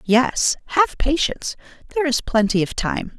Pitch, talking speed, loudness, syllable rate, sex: 270 Hz, 150 wpm, -20 LUFS, 4.9 syllables/s, female